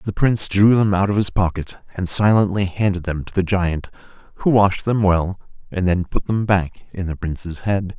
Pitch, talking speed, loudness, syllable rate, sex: 95 Hz, 210 wpm, -19 LUFS, 5.0 syllables/s, male